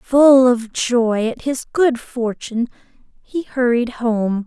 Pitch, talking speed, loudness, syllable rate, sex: 245 Hz, 135 wpm, -18 LUFS, 3.4 syllables/s, female